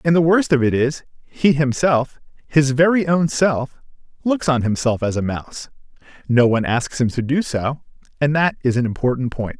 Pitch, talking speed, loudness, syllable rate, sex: 140 Hz, 195 wpm, -18 LUFS, 5.0 syllables/s, male